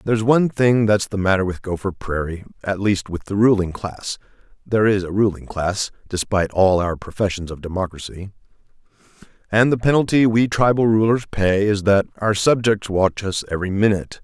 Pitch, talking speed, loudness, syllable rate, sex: 100 Hz, 175 wpm, -19 LUFS, 4.1 syllables/s, male